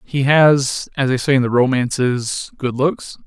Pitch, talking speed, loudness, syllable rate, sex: 130 Hz, 145 wpm, -17 LUFS, 4.1 syllables/s, male